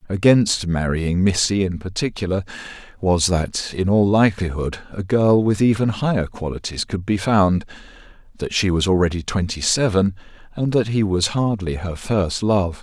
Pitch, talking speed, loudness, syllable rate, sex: 95 Hz, 155 wpm, -20 LUFS, 4.7 syllables/s, male